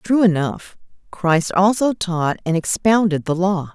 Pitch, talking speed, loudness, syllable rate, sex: 180 Hz, 145 wpm, -18 LUFS, 3.9 syllables/s, female